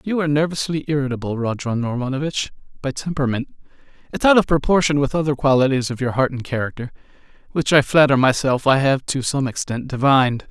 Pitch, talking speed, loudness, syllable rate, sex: 135 Hz, 170 wpm, -19 LUFS, 6.2 syllables/s, male